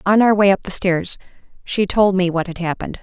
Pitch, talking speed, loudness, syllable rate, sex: 190 Hz, 240 wpm, -18 LUFS, 5.7 syllables/s, female